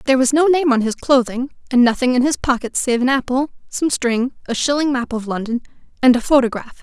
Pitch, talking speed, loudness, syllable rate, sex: 255 Hz, 220 wpm, -17 LUFS, 5.8 syllables/s, female